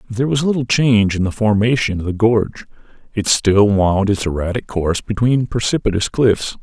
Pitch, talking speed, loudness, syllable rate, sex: 110 Hz, 170 wpm, -16 LUFS, 5.4 syllables/s, male